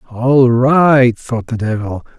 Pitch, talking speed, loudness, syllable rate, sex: 125 Hz, 135 wpm, -13 LUFS, 3.2 syllables/s, male